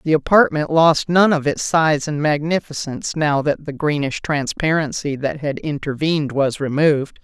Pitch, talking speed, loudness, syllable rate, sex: 150 Hz, 160 wpm, -18 LUFS, 4.8 syllables/s, female